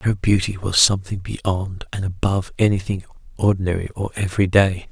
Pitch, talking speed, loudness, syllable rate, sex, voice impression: 95 Hz, 135 wpm, -20 LUFS, 5.4 syllables/s, male, very masculine, old, very thick, very relaxed, very weak, very dark, very soft, very muffled, raspy, cool, very intellectual, sincere, very calm, very mature, very friendly, reassuring, very unique, very elegant, wild, very sweet, slightly lively, very kind, very modest